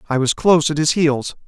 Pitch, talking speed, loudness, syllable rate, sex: 150 Hz, 245 wpm, -17 LUFS, 5.9 syllables/s, male